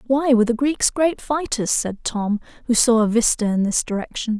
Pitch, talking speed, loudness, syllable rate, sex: 240 Hz, 205 wpm, -20 LUFS, 5.1 syllables/s, female